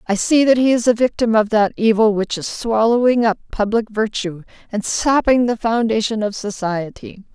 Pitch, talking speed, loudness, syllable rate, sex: 220 Hz, 180 wpm, -17 LUFS, 4.9 syllables/s, female